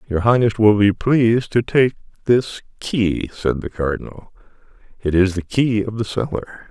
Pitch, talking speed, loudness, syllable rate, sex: 110 Hz, 170 wpm, -18 LUFS, 4.5 syllables/s, male